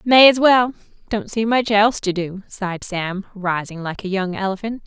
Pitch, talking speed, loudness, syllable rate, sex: 205 Hz, 195 wpm, -19 LUFS, 4.9 syllables/s, female